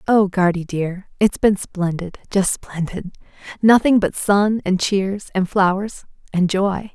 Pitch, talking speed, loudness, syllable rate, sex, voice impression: 190 Hz, 120 wpm, -19 LUFS, 3.8 syllables/s, female, feminine, adult-like, slightly fluent, slightly intellectual, slightly sweet